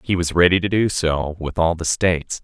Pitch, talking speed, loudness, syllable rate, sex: 85 Hz, 245 wpm, -19 LUFS, 5.2 syllables/s, male